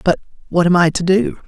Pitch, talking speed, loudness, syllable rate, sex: 180 Hz, 205 wpm, -16 LUFS, 5.9 syllables/s, male